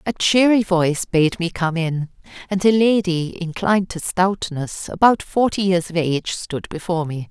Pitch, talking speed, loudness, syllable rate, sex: 180 Hz, 175 wpm, -19 LUFS, 4.7 syllables/s, female